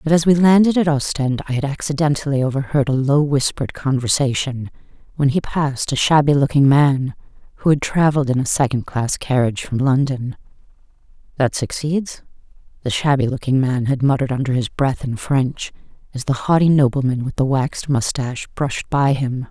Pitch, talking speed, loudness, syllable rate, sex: 135 Hz, 170 wpm, -18 LUFS, 5.5 syllables/s, female